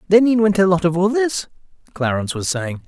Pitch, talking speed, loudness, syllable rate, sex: 180 Hz, 210 wpm, -18 LUFS, 5.7 syllables/s, male